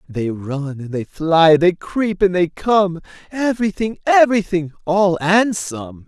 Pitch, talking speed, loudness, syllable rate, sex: 180 Hz, 150 wpm, -17 LUFS, 3.9 syllables/s, male